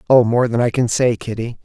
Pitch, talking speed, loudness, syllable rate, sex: 120 Hz, 255 wpm, -17 LUFS, 5.7 syllables/s, male